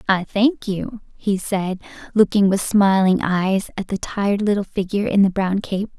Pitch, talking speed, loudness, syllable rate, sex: 195 Hz, 180 wpm, -19 LUFS, 4.6 syllables/s, female